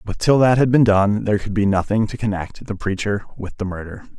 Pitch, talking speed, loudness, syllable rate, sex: 105 Hz, 245 wpm, -19 LUFS, 5.8 syllables/s, male